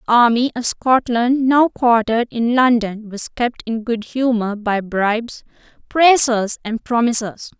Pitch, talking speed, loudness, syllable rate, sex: 235 Hz, 140 wpm, -17 LUFS, 4.2 syllables/s, female